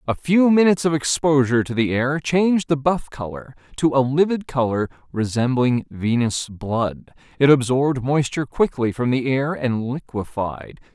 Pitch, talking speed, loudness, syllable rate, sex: 135 Hz, 155 wpm, -20 LUFS, 4.8 syllables/s, male